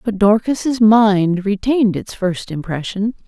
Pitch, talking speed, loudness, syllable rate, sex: 205 Hz, 130 wpm, -16 LUFS, 3.9 syllables/s, female